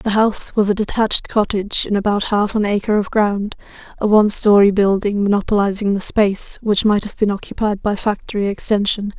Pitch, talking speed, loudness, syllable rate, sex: 205 Hz, 185 wpm, -17 LUFS, 5.7 syllables/s, female